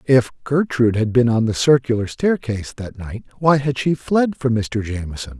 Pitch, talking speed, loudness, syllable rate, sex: 125 Hz, 190 wpm, -19 LUFS, 5.1 syllables/s, male